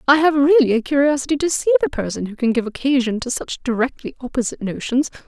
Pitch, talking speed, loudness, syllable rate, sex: 265 Hz, 205 wpm, -19 LUFS, 6.5 syllables/s, female